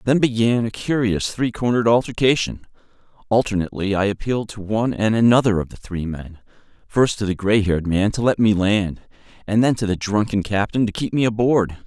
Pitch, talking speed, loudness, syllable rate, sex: 110 Hz, 185 wpm, -20 LUFS, 5.7 syllables/s, male